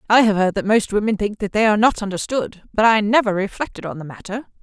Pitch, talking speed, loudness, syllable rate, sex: 210 Hz, 235 wpm, -19 LUFS, 6.1 syllables/s, female